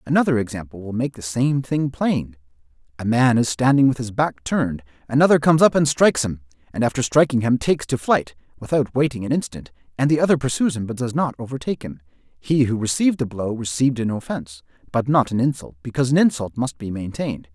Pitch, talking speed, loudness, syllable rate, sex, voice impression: 125 Hz, 210 wpm, -20 LUFS, 6.2 syllables/s, male, masculine, adult-like, tensed, very clear, refreshing, friendly, lively